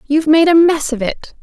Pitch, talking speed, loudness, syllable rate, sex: 300 Hz, 250 wpm, -13 LUFS, 6.7 syllables/s, female